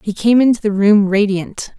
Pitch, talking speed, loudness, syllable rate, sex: 205 Hz, 200 wpm, -14 LUFS, 4.8 syllables/s, female